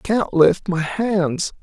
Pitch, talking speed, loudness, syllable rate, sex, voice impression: 185 Hz, 150 wpm, -19 LUFS, 2.6 syllables/s, male, very masculine, very adult-like, middle-aged, slightly thick, slightly tensed, slightly weak, slightly dark, hard, slightly muffled, fluent, cool, very intellectual, refreshing, very sincere, very calm, slightly mature, friendly, reassuring, slightly unique, elegant, sweet, slightly lively, kind, very modest